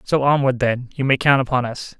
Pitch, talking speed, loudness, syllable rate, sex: 130 Hz, 240 wpm, -19 LUFS, 5.5 syllables/s, male